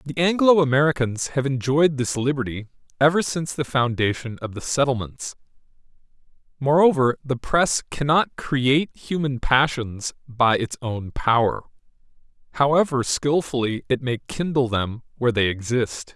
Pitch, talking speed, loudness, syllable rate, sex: 135 Hz, 125 wpm, -22 LUFS, 4.7 syllables/s, male